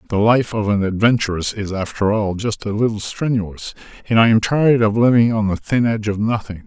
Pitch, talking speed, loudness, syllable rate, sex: 110 Hz, 215 wpm, -18 LUFS, 5.6 syllables/s, male